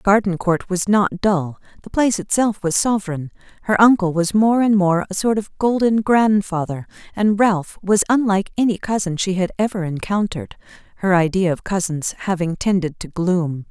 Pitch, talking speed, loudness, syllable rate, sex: 195 Hz, 160 wpm, -19 LUFS, 5.0 syllables/s, female